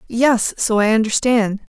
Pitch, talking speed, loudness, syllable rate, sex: 225 Hz, 135 wpm, -17 LUFS, 4.2 syllables/s, female